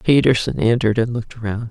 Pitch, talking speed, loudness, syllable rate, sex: 115 Hz, 175 wpm, -18 LUFS, 6.8 syllables/s, female